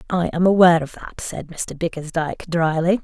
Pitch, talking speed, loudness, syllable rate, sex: 170 Hz, 180 wpm, -20 LUFS, 5.4 syllables/s, female